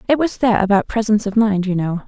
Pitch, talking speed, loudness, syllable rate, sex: 210 Hz, 260 wpm, -17 LUFS, 6.4 syllables/s, female